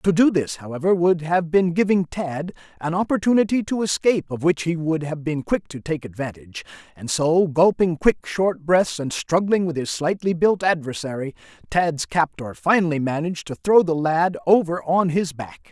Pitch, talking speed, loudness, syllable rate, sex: 165 Hz, 185 wpm, -21 LUFS, 4.9 syllables/s, male